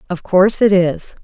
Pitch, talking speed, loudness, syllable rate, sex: 190 Hz, 195 wpm, -14 LUFS, 5.1 syllables/s, female